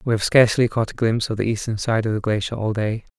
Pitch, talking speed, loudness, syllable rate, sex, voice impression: 110 Hz, 285 wpm, -21 LUFS, 6.7 syllables/s, male, masculine, adult-like, slightly dark, slightly calm, slightly friendly, kind